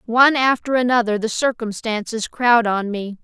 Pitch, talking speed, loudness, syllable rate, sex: 230 Hz, 150 wpm, -18 LUFS, 4.9 syllables/s, female